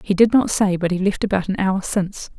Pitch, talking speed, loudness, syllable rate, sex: 195 Hz, 275 wpm, -19 LUFS, 5.8 syllables/s, female